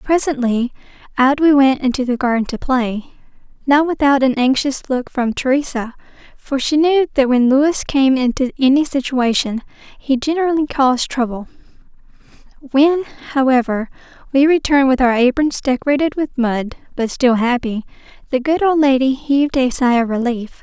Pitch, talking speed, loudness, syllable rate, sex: 265 Hz, 150 wpm, -16 LUFS, 5.1 syllables/s, female